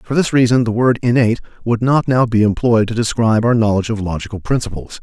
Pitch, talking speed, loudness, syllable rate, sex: 115 Hz, 215 wpm, -15 LUFS, 6.4 syllables/s, male